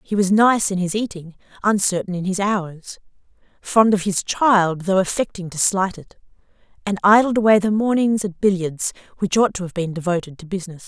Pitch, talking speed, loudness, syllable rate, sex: 195 Hz, 190 wpm, -19 LUFS, 5.3 syllables/s, female